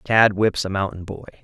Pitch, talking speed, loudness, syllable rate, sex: 100 Hz, 210 wpm, -20 LUFS, 5.5 syllables/s, male